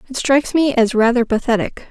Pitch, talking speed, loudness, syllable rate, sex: 250 Hz, 190 wpm, -16 LUFS, 5.9 syllables/s, female